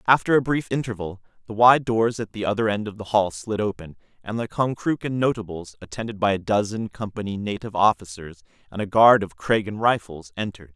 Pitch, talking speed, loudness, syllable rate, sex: 105 Hz, 190 wpm, -23 LUFS, 5.7 syllables/s, male